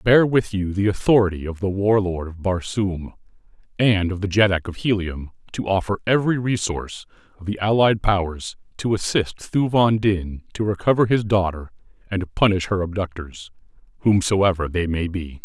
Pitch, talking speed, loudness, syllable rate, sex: 95 Hz, 155 wpm, -21 LUFS, 5.0 syllables/s, male